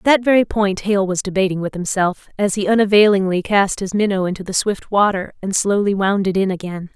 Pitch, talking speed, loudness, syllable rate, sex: 195 Hz, 205 wpm, -17 LUFS, 5.5 syllables/s, female